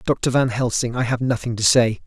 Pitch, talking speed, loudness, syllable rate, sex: 120 Hz, 230 wpm, -19 LUFS, 5.2 syllables/s, male